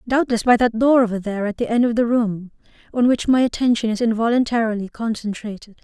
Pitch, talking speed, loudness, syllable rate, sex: 230 Hz, 195 wpm, -19 LUFS, 6.1 syllables/s, female